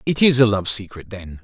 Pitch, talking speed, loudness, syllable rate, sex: 110 Hz, 250 wpm, -18 LUFS, 5.4 syllables/s, male